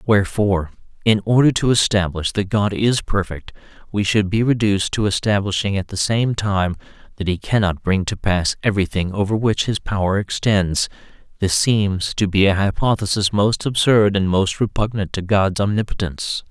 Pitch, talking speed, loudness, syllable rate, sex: 100 Hz, 165 wpm, -19 LUFS, 5.1 syllables/s, male